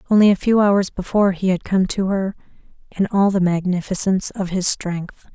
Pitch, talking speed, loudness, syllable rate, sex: 190 Hz, 190 wpm, -19 LUFS, 5.3 syllables/s, female